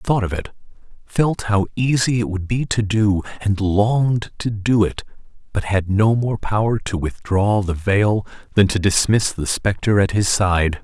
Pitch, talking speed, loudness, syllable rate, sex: 105 Hz, 190 wpm, -19 LUFS, 4.4 syllables/s, male